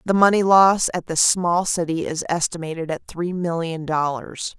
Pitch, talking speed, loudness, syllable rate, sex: 170 Hz, 170 wpm, -20 LUFS, 4.5 syllables/s, female